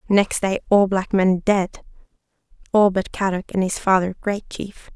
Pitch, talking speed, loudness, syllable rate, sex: 195 Hz, 170 wpm, -20 LUFS, 4.4 syllables/s, female